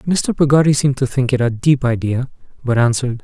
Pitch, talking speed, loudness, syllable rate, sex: 130 Hz, 205 wpm, -16 LUFS, 5.9 syllables/s, male